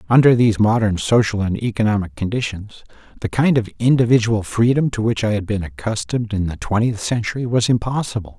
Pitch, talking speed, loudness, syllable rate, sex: 110 Hz, 170 wpm, -18 LUFS, 6.0 syllables/s, male